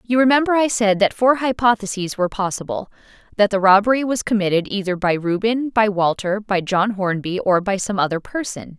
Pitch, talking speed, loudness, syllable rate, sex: 210 Hz, 185 wpm, -19 LUFS, 5.5 syllables/s, female